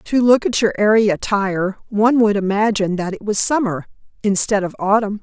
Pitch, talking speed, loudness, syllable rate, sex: 205 Hz, 185 wpm, -17 LUFS, 5.6 syllables/s, female